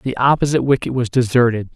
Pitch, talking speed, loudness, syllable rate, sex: 125 Hz, 170 wpm, -17 LUFS, 6.6 syllables/s, male